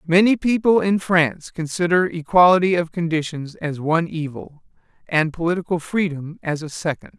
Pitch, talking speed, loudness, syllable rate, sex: 170 Hz, 140 wpm, -20 LUFS, 5.2 syllables/s, male